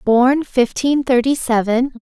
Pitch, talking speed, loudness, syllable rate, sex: 250 Hz, 120 wpm, -16 LUFS, 3.9 syllables/s, female